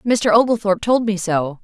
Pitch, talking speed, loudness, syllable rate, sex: 210 Hz, 185 wpm, -17 LUFS, 5.0 syllables/s, female